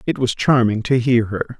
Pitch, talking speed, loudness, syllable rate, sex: 120 Hz, 225 wpm, -18 LUFS, 4.8 syllables/s, male